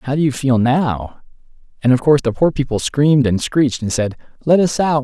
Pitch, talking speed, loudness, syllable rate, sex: 135 Hz, 225 wpm, -16 LUFS, 5.8 syllables/s, male